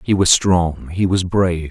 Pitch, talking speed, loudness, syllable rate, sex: 90 Hz, 210 wpm, -16 LUFS, 4.2 syllables/s, male